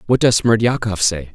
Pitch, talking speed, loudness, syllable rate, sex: 105 Hz, 180 wpm, -16 LUFS, 5.1 syllables/s, male